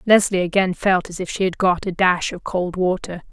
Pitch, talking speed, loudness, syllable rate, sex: 185 Hz, 235 wpm, -20 LUFS, 5.1 syllables/s, female